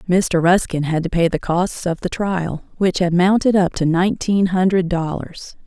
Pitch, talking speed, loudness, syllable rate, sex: 180 Hz, 190 wpm, -18 LUFS, 4.6 syllables/s, female